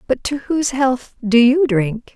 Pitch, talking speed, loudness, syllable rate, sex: 255 Hz, 195 wpm, -17 LUFS, 4.2 syllables/s, female